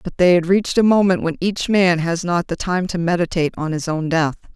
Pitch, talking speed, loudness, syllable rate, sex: 175 Hz, 250 wpm, -18 LUFS, 5.6 syllables/s, female